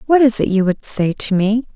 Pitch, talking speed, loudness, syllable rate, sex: 215 Hz, 275 wpm, -16 LUFS, 5.2 syllables/s, female